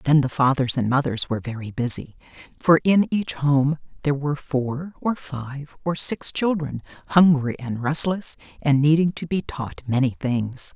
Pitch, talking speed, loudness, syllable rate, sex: 140 Hz, 165 wpm, -22 LUFS, 4.6 syllables/s, female